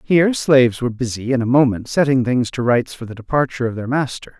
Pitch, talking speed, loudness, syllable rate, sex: 130 Hz, 230 wpm, -18 LUFS, 6.3 syllables/s, male